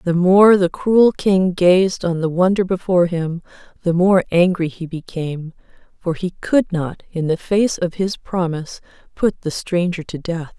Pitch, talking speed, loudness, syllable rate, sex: 180 Hz, 175 wpm, -18 LUFS, 4.4 syllables/s, female